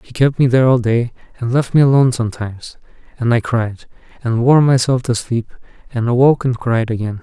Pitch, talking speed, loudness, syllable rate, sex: 120 Hz, 200 wpm, -16 LUFS, 5.9 syllables/s, male